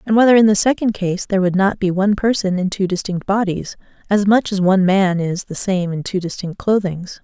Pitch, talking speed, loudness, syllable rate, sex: 195 Hz, 230 wpm, -17 LUFS, 5.6 syllables/s, female